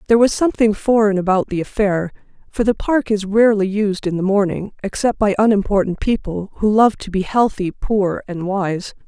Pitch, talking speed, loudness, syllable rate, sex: 205 Hz, 185 wpm, -18 LUFS, 5.3 syllables/s, female